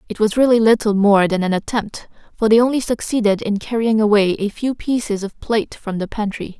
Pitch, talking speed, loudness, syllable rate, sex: 215 Hz, 210 wpm, -17 LUFS, 5.5 syllables/s, female